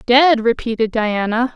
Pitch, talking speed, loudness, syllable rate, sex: 235 Hz, 115 wpm, -16 LUFS, 4.2 syllables/s, female